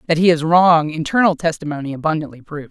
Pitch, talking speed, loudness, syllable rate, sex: 160 Hz, 180 wpm, -16 LUFS, 6.5 syllables/s, female